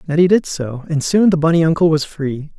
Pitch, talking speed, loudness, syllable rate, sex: 160 Hz, 230 wpm, -16 LUFS, 5.6 syllables/s, male